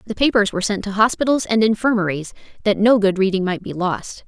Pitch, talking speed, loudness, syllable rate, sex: 205 Hz, 210 wpm, -18 LUFS, 6.1 syllables/s, female